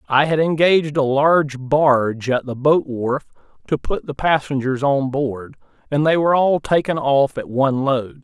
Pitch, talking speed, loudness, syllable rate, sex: 140 Hz, 180 wpm, -18 LUFS, 4.7 syllables/s, male